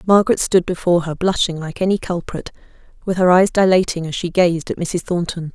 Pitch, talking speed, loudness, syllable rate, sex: 175 Hz, 195 wpm, -17 LUFS, 5.7 syllables/s, female